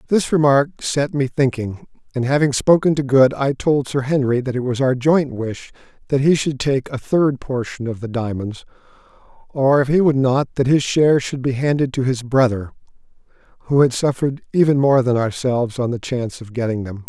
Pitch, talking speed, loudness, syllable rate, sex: 130 Hz, 200 wpm, -18 LUFS, 5.2 syllables/s, male